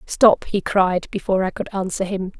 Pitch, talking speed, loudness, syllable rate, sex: 190 Hz, 200 wpm, -20 LUFS, 5.1 syllables/s, female